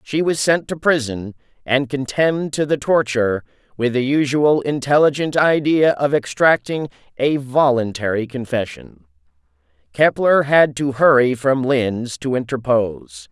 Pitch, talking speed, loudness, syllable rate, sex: 130 Hz, 125 wpm, -18 LUFS, 4.4 syllables/s, male